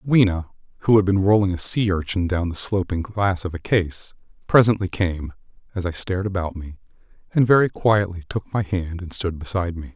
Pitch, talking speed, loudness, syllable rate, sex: 95 Hz, 195 wpm, -21 LUFS, 5.4 syllables/s, male